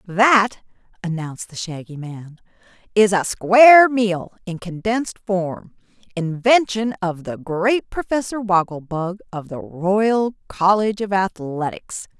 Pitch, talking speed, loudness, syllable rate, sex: 195 Hz, 125 wpm, -19 LUFS, 3.9 syllables/s, female